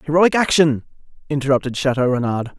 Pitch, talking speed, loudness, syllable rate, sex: 140 Hz, 115 wpm, -18 LUFS, 6.4 syllables/s, male